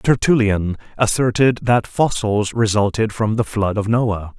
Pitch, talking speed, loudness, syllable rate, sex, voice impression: 110 Hz, 135 wpm, -18 LUFS, 4.2 syllables/s, male, very masculine, slightly middle-aged, thick, tensed, powerful, bright, slightly soft, very clear, fluent, slightly raspy, cool, very intellectual, refreshing, very sincere, calm, very friendly, very reassuring, unique, elegant, slightly wild, sweet, lively, kind, slightly intense